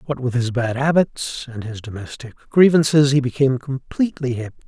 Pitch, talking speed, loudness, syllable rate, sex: 130 Hz, 165 wpm, -19 LUFS, 5.7 syllables/s, male